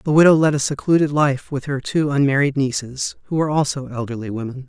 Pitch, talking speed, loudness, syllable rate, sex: 140 Hz, 205 wpm, -19 LUFS, 6.1 syllables/s, male